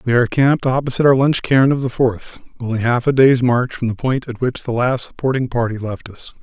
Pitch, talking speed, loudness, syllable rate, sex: 125 Hz, 245 wpm, -17 LUFS, 5.8 syllables/s, male